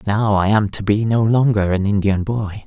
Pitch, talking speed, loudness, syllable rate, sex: 105 Hz, 225 wpm, -17 LUFS, 4.7 syllables/s, male